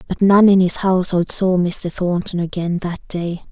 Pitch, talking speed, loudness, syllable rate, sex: 180 Hz, 190 wpm, -17 LUFS, 4.6 syllables/s, female